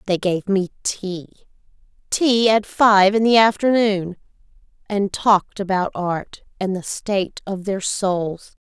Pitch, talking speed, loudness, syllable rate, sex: 195 Hz, 125 wpm, -19 LUFS, 3.9 syllables/s, female